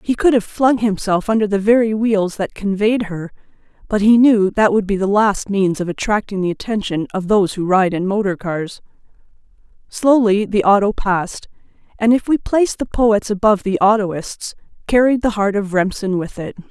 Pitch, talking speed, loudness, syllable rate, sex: 205 Hz, 185 wpm, -16 LUFS, 5.1 syllables/s, female